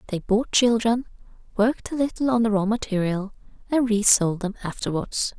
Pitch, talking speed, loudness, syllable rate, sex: 220 Hz, 155 wpm, -23 LUFS, 5.3 syllables/s, female